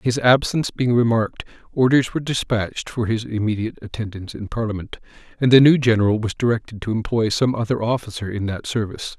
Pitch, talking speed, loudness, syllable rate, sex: 115 Hz, 175 wpm, -20 LUFS, 6.2 syllables/s, male